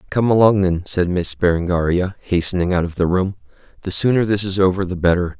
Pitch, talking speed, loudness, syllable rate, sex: 90 Hz, 200 wpm, -18 LUFS, 5.8 syllables/s, male